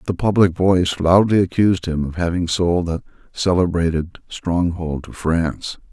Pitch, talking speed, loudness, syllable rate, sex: 85 Hz, 140 wpm, -19 LUFS, 4.7 syllables/s, male